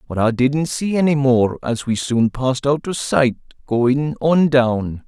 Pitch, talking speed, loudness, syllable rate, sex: 130 Hz, 190 wpm, -18 LUFS, 4.0 syllables/s, male